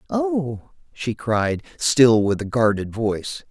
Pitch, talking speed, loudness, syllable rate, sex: 120 Hz, 135 wpm, -21 LUFS, 3.4 syllables/s, male